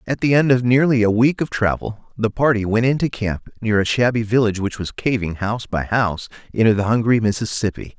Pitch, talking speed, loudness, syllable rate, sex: 115 Hz, 210 wpm, -19 LUFS, 5.8 syllables/s, male